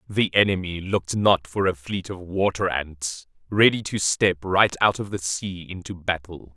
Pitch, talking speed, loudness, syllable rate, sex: 90 Hz, 185 wpm, -23 LUFS, 4.4 syllables/s, male